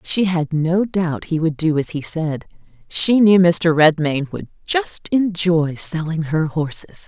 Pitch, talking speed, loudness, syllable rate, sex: 170 Hz, 170 wpm, -18 LUFS, 3.8 syllables/s, female